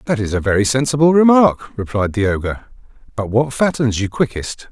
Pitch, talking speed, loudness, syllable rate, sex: 120 Hz, 180 wpm, -16 LUFS, 5.6 syllables/s, male